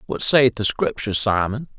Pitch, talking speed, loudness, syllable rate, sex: 110 Hz, 170 wpm, -19 LUFS, 4.5 syllables/s, male